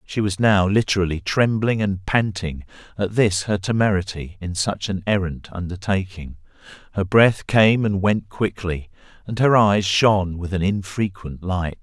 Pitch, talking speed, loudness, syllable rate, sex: 95 Hz, 150 wpm, -20 LUFS, 4.5 syllables/s, male